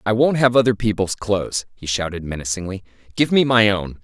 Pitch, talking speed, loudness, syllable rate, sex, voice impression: 105 Hz, 195 wpm, -19 LUFS, 5.7 syllables/s, male, very masculine, very adult-like, thick, sincere, mature, slightly kind